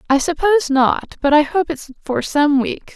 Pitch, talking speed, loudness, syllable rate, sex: 300 Hz, 205 wpm, -17 LUFS, 4.7 syllables/s, female